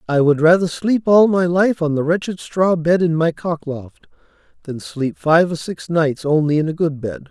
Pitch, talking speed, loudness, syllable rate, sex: 165 Hz, 220 wpm, -17 LUFS, 4.6 syllables/s, male